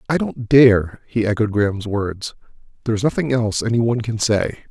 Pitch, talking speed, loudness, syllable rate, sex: 115 Hz, 180 wpm, -18 LUFS, 5.5 syllables/s, male